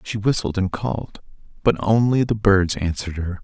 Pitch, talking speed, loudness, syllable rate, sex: 100 Hz, 175 wpm, -21 LUFS, 5.1 syllables/s, male